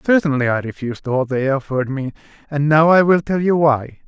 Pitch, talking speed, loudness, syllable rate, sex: 145 Hz, 205 wpm, -17 LUFS, 5.7 syllables/s, male